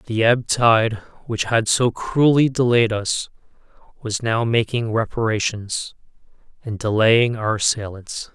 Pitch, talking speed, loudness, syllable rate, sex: 115 Hz, 120 wpm, -19 LUFS, 3.9 syllables/s, male